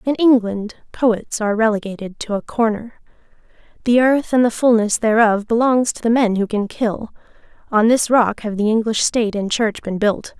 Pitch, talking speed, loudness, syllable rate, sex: 220 Hz, 185 wpm, -17 LUFS, 5.0 syllables/s, female